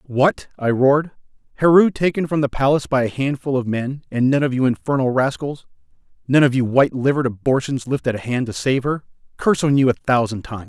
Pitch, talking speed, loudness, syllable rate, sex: 135 Hz, 195 wpm, -19 LUFS, 6.2 syllables/s, male